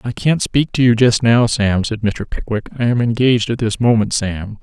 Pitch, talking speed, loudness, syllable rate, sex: 115 Hz, 235 wpm, -16 LUFS, 5.0 syllables/s, male